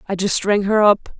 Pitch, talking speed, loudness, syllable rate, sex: 200 Hz, 250 wpm, -17 LUFS, 6.0 syllables/s, female